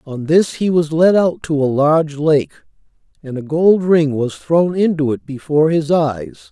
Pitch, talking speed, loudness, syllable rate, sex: 155 Hz, 195 wpm, -15 LUFS, 4.5 syllables/s, male